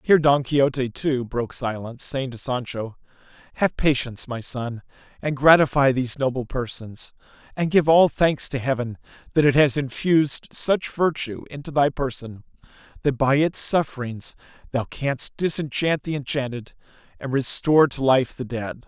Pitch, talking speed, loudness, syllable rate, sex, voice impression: 135 Hz, 155 wpm, -22 LUFS, 4.9 syllables/s, male, masculine, very adult-like, intellectual, slightly refreshing, slightly unique